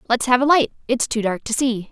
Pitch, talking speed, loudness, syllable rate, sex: 240 Hz, 280 wpm, -19 LUFS, 5.7 syllables/s, female